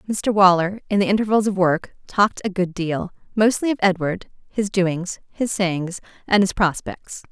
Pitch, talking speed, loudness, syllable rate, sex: 190 Hz, 170 wpm, -20 LUFS, 4.6 syllables/s, female